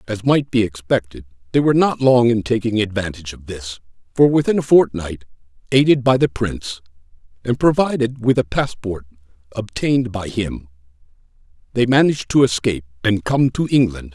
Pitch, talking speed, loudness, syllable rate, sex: 110 Hz, 155 wpm, -18 LUFS, 5.5 syllables/s, male